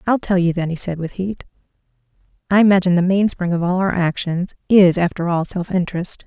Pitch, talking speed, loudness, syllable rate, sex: 180 Hz, 200 wpm, -18 LUFS, 5.9 syllables/s, female